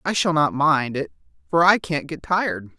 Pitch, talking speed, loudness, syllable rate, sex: 145 Hz, 215 wpm, -21 LUFS, 4.8 syllables/s, male